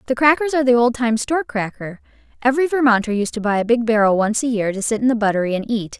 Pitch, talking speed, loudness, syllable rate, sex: 235 Hz, 250 wpm, -18 LUFS, 6.9 syllables/s, female